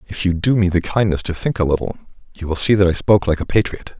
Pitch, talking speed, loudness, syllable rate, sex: 90 Hz, 285 wpm, -18 LUFS, 6.6 syllables/s, male